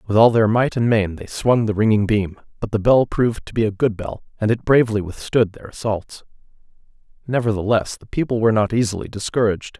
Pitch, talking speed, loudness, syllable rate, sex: 110 Hz, 200 wpm, -19 LUFS, 6.0 syllables/s, male